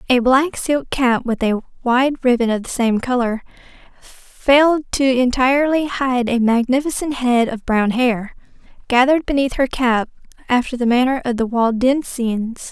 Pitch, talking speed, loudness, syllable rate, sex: 250 Hz, 150 wpm, -17 LUFS, 4.5 syllables/s, female